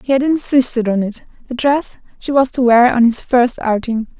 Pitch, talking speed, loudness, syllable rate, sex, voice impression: 245 Hz, 200 wpm, -15 LUFS, 5.0 syllables/s, female, feminine, slightly adult-like, soft, calm, friendly, slightly sweet, slightly kind